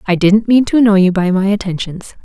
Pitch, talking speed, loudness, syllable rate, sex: 200 Hz, 240 wpm, -12 LUFS, 5.8 syllables/s, female